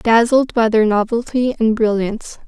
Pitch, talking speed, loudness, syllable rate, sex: 225 Hz, 145 wpm, -16 LUFS, 4.7 syllables/s, female